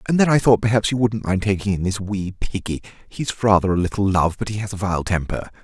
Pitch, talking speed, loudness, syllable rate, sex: 100 Hz, 255 wpm, -20 LUFS, 5.9 syllables/s, male